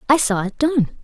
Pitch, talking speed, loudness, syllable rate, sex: 250 Hz, 230 wpm, -19 LUFS, 5.3 syllables/s, female